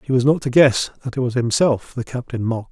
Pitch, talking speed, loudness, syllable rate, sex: 125 Hz, 265 wpm, -19 LUFS, 6.2 syllables/s, male